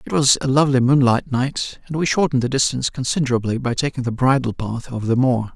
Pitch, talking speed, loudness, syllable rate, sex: 130 Hz, 215 wpm, -19 LUFS, 6.4 syllables/s, male